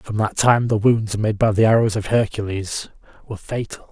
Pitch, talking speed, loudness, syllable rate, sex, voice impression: 110 Hz, 200 wpm, -19 LUFS, 5.1 syllables/s, male, masculine, middle-aged, slightly relaxed, powerful, muffled, raspy, calm, slightly mature, slightly friendly, wild, lively